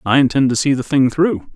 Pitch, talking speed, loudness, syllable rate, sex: 135 Hz, 270 wpm, -16 LUFS, 5.7 syllables/s, male